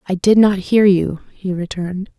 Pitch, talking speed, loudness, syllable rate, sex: 190 Hz, 190 wpm, -16 LUFS, 4.7 syllables/s, female